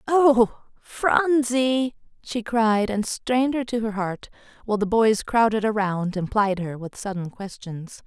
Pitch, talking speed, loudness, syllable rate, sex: 220 Hz, 155 wpm, -23 LUFS, 4.0 syllables/s, female